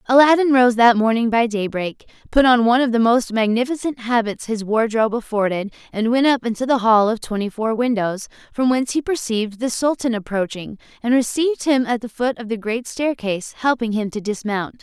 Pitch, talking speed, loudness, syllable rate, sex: 235 Hz, 195 wpm, -19 LUFS, 5.6 syllables/s, female